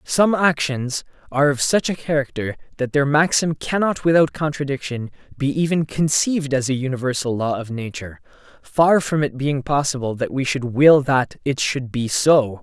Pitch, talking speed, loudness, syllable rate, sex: 140 Hz, 170 wpm, -20 LUFS, 4.9 syllables/s, male